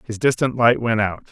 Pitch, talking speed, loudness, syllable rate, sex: 115 Hz, 230 wpm, -19 LUFS, 5.3 syllables/s, male